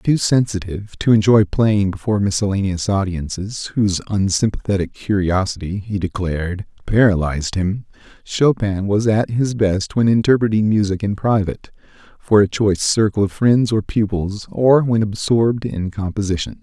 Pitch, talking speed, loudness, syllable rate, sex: 100 Hz, 135 wpm, -18 LUFS, 5.0 syllables/s, male